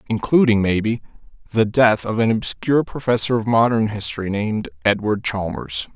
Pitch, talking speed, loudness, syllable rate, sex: 110 Hz, 140 wpm, -19 LUFS, 5.3 syllables/s, male